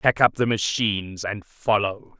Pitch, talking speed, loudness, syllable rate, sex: 105 Hz, 165 wpm, -23 LUFS, 4.2 syllables/s, male